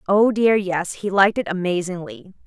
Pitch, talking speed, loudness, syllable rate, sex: 190 Hz, 170 wpm, -19 LUFS, 5.3 syllables/s, female